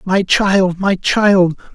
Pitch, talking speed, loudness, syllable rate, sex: 190 Hz, 135 wpm, -14 LUFS, 2.7 syllables/s, male